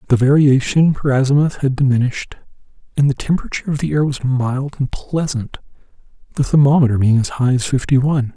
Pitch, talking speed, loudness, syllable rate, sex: 135 Hz, 170 wpm, -16 LUFS, 6.1 syllables/s, male